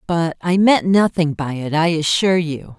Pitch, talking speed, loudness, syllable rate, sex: 165 Hz, 195 wpm, -17 LUFS, 4.6 syllables/s, female